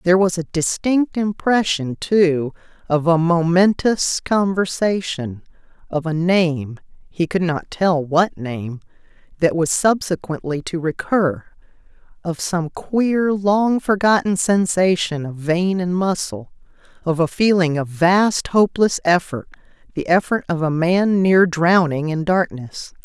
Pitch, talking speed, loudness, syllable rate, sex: 175 Hz, 125 wpm, -18 LUFS, 3.9 syllables/s, female